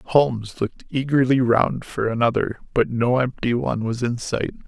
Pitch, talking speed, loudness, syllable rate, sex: 120 Hz, 165 wpm, -22 LUFS, 4.9 syllables/s, male